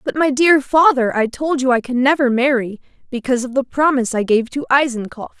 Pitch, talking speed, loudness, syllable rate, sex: 260 Hz, 210 wpm, -16 LUFS, 5.7 syllables/s, female